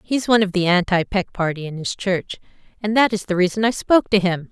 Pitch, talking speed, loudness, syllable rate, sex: 195 Hz, 255 wpm, -19 LUFS, 6.0 syllables/s, female